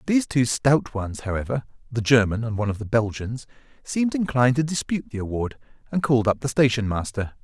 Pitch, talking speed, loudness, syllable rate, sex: 120 Hz, 180 wpm, -23 LUFS, 6.2 syllables/s, male